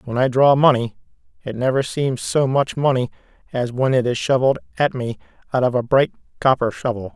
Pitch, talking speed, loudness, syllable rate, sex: 130 Hz, 195 wpm, -19 LUFS, 5.6 syllables/s, male